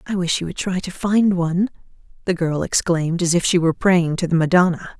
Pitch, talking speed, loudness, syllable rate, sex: 175 Hz, 230 wpm, -19 LUFS, 5.9 syllables/s, female